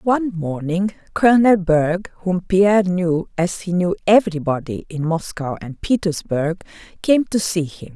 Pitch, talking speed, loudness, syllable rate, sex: 180 Hz, 145 wpm, -19 LUFS, 4.5 syllables/s, female